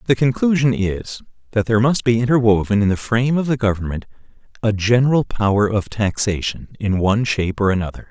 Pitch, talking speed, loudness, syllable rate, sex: 110 Hz, 180 wpm, -18 LUFS, 6.0 syllables/s, male